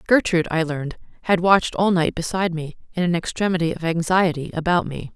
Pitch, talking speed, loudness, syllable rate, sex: 170 Hz, 185 wpm, -21 LUFS, 6.3 syllables/s, female